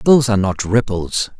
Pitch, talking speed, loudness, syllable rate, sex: 105 Hz, 170 wpm, -17 LUFS, 5.8 syllables/s, male